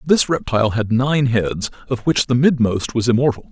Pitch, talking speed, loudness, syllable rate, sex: 125 Hz, 190 wpm, -18 LUFS, 5.0 syllables/s, male